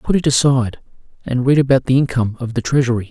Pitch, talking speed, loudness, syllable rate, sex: 130 Hz, 215 wpm, -16 LUFS, 7.0 syllables/s, male